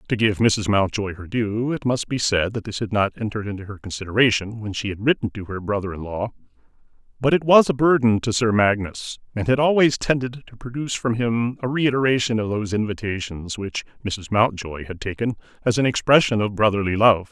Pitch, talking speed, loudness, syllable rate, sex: 110 Hz, 205 wpm, -21 LUFS, 5.7 syllables/s, male